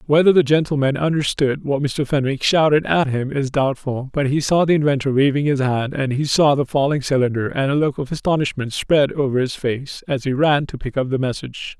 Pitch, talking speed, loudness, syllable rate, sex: 140 Hz, 220 wpm, -19 LUFS, 5.5 syllables/s, male